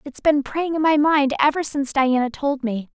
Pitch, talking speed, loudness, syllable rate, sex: 280 Hz, 225 wpm, -20 LUFS, 5.2 syllables/s, female